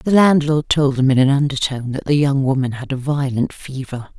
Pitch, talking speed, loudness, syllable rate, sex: 140 Hz, 215 wpm, -17 LUFS, 5.4 syllables/s, female